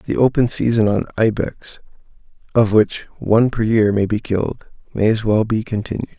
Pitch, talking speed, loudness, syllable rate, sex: 110 Hz, 175 wpm, -18 LUFS, 5.3 syllables/s, male